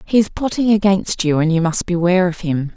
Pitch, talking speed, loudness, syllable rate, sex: 185 Hz, 240 wpm, -17 LUFS, 5.7 syllables/s, female